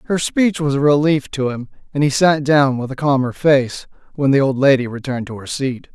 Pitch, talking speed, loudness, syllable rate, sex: 140 Hz, 230 wpm, -17 LUFS, 5.4 syllables/s, male